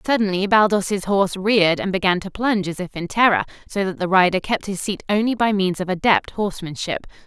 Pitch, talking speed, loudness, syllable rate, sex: 195 Hz, 205 wpm, -20 LUFS, 5.9 syllables/s, female